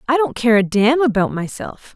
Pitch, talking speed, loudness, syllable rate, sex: 240 Hz, 215 wpm, -17 LUFS, 5.0 syllables/s, female